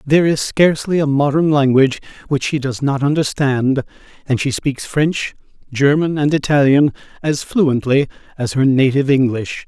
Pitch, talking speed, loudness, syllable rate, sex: 140 Hz, 150 wpm, -16 LUFS, 5.0 syllables/s, male